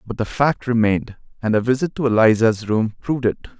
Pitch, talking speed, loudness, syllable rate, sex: 115 Hz, 200 wpm, -19 LUFS, 5.8 syllables/s, male